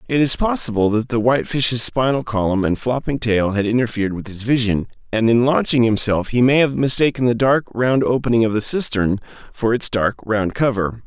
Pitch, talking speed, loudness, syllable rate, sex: 120 Hz, 195 wpm, -18 LUFS, 5.3 syllables/s, male